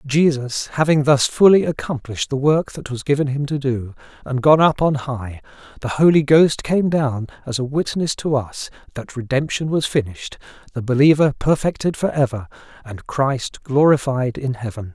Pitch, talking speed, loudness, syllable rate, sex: 135 Hz, 165 wpm, -18 LUFS, 4.9 syllables/s, male